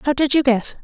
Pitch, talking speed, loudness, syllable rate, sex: 265 Hz, 285 wpm, -17 LUFS, 5.3 syllables/s, female